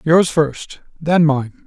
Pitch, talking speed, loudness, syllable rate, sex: 155 Hz, 145 wpm, -16 LUFS, 3.1 syllables/s, male